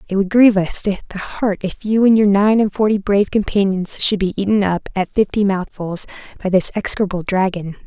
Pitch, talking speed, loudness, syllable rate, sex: 200 Hz, 205 wpm, -17 LUFS, 5.6 syllables/s, female